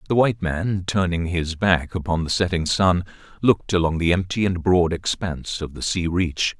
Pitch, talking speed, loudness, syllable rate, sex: 90 Hz, 190 wpm, -22 LUFS, 5.0 syllables/s, male